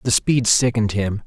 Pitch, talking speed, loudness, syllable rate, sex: 110 Hz, 190 wpm, -18 LUFS, 5.2 syllables/s, male